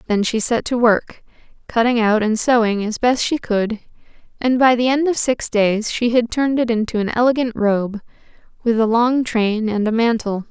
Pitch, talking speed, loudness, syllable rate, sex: 230 Hz, 200 wpm, -18 LUFS, 4.9 syllables/s, female